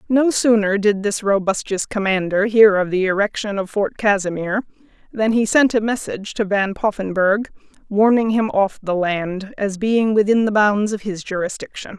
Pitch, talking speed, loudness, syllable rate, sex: 205 Hz, 170 wpm, -18 LUFS, 4.8 syllables/s, female